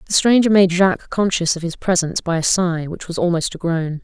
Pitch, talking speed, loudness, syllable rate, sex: 175 Hz, 240 wpm, -18 LUFS, 5.7 syllables/s, female